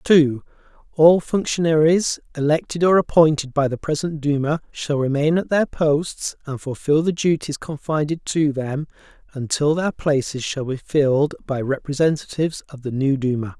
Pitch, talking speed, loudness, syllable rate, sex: 150 Hz, 150 wpm, -20 LUFS, 4.9 syllables/s, male